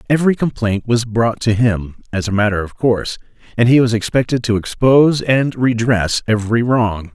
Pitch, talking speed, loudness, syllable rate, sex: 115 Hz, 175 wpm, -16 LUFS, 5.2 syllables/s, male